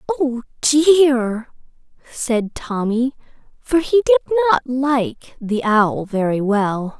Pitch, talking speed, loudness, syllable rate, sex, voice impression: 255 Hz, 110 wpm, -18 LUFS, 3.0 syllables/s, female, very feminine, very young, very thin, very tensed, powerful, very bright, hard, very clear, very fluent, very cute, slightly intellectual, refreshing, sincere, very calm, very friendly, reassuring, very unique, very elegant, wild, very sweet, very lively, very kind, slightly intense, sharp, very light